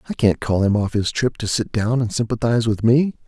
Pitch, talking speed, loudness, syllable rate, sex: 115 Hz, 255 wpm, -19 LUFS, 5.6 syllables/s, male